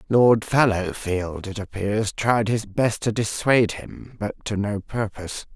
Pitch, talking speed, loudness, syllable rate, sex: 105 Hz, 150 wpm, -23 LUFS, 4.1 syllables/s, female